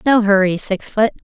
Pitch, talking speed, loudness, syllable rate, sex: 210 Hz, 180 wpm, -16 LUFS, 4.9 syllables/s, female